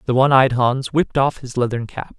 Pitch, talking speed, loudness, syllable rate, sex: 130 Hz, 245 wpm, -18 LUFS, 5.9 syllables/s, male